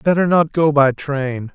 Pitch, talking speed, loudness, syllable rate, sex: 150 Hz, 195 wpm, -16 LUFS, 4.2 syllables/s, male